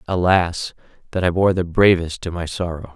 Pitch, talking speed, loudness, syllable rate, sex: 90 Hz, 185 wpm, -19 LUFS, 4.9 syllables/s, male